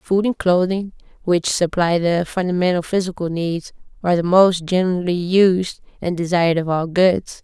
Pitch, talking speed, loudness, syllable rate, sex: 180 Hz, 155 wpm, -18 LUFS, 4.9 syllables/s, female